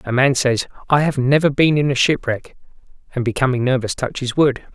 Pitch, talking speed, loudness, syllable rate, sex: 130 Hz, 190 wpm, -18 LUFS, 5.6 syllables/s, male